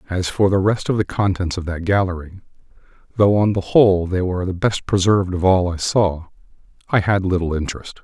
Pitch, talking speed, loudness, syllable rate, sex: 95 Hz, 200 wpm, -18 LUFS, 5.7 syllables/s, male